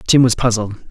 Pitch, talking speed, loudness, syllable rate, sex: 115 Hz, 200 wpm, -15 LUFS, 5.3 syllables/s, male